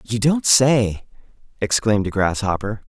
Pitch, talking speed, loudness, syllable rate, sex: 110 Hz, 125 wpm, -18 LUFS, 4.6 syllables/s, male